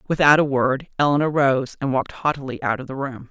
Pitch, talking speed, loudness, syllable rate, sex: 135 Hz, 220 wpm, -20 LUFS, 6.0 syllables/s, female